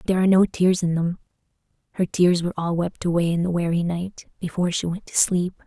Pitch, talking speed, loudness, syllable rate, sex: 175 Hz, 235 wpm, -22 LUFS, 6.4 syllables/s, female